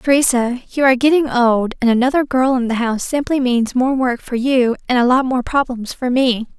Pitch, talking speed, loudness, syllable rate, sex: 250 Hz, 220 wpm, -16 LUFS, 5.4 syllables/s, female